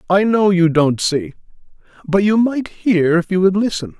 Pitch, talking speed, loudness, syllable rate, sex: 185 Hz, 195 wpm, -16 LUFS, 4.6 syllables/s, male